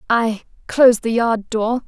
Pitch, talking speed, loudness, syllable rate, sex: 230 Hz, 160 wpm, -17 LUFS, 4.2 syllables/s, female